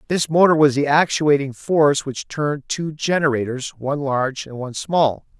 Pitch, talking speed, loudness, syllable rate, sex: 145 Hz, 165 wpm, -19 LUFS, 5.2 syllables/s, male